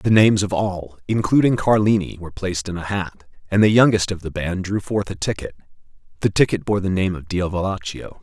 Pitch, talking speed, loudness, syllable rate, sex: 95 Hz, 205 wpm, -20 LUFS, 5.7 syllables/s, male